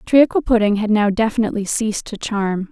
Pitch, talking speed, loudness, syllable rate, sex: 215 Hz, 175 wpm, -18 LUFS, 5.8 syllables/s, female